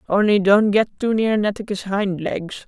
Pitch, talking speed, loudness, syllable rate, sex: 205 Hz, 180 wpm, -19 LUFS, 4.4 syllables/s, female